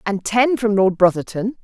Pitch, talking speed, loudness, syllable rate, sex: 210 Hz, 185 wpm, -17 LUFS, 4.7 syllables/s, female